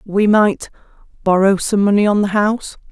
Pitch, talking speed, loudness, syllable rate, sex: 200 Hz, 145 wpm, -15 LUFS, 5.0 syllables/s, female